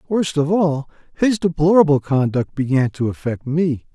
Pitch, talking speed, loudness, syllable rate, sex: 155 Hz, 150 wpm, -18 LUFS, 4.7 syllables/s, male